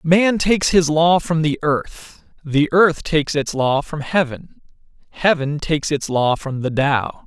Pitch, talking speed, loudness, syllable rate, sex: 155 Hz, 175 wpm, -18 LUFS, 4.1 syllables/s, male